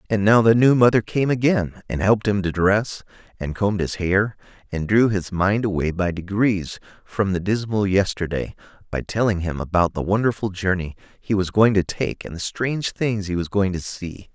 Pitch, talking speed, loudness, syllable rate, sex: 100 Hz, 200 wpm, -21 LUFS, 5.0 syllables/s, male